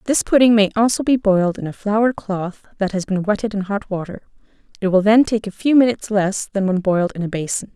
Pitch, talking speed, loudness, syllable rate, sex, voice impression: 205 Hz, 240 wpm, -18 LUFS, 6.0 syllables/s, female, feminine, adult-like, slightly muffled, slightly fluent, slightly intellectual, slightly calm, slightly elegant, slightly sweet